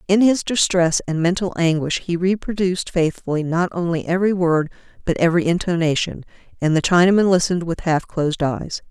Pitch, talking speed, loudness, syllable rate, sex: 175 Hz, 160 wpm, -19 LUFS, 5.7 syllables/s, female